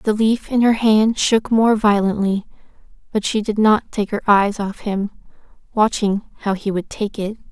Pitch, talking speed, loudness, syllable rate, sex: 210 Hz, 185 wpm, -18 LUFS, 4.5 syllables/s, female